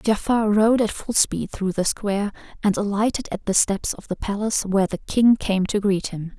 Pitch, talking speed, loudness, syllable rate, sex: 205 Hz, 215 wpm, -22 LUFS, 5.1 syllables/s, female